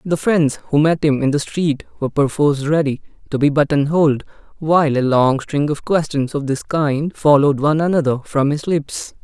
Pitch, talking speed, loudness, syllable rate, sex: 145 Hz, 195 wpm, -17 LUFS, 5.3 syllables/s, male